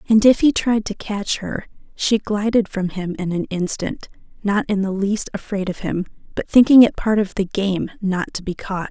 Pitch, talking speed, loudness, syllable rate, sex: 200 Hz, 215 wpm, -19 LUFS, 4.7 syllables/s, female